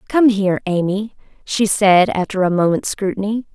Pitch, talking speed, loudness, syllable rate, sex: 200 Hz, 150 wpm, -17 LUFS, 5.0 syllables/s, female